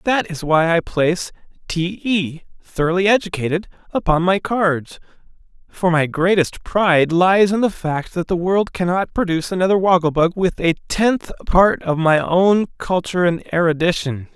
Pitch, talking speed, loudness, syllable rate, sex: 180 Hz, 160 wpm, -18 LUFS, 4.7 syllables/s, male